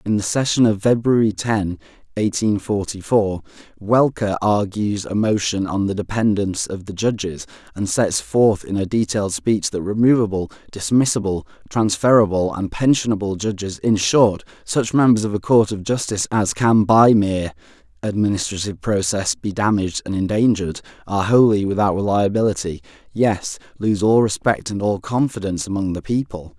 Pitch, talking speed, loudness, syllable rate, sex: 105 Hz, 145 wpm, -19 LUFS, 5.2 syllables/s, male